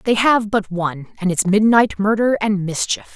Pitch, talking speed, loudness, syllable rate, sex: 205 Hz, 190 wpm, -17 LUFS, 5.0 syllables/s, female